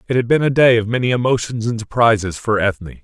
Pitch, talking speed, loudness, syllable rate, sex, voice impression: 115 Hz, 235 wpm, -16 LUFS, 6.3 syllables/s, male, masculine, adult-like, tensed, clear, fluent, cool, intellectual, sincere, slightly friendly, elegant, slightly strict, slightly sharp